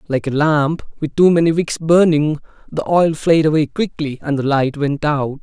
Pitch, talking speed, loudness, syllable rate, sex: 155 Hz, 200 wpm, -16 LUFS, 4.8 syllables/s, male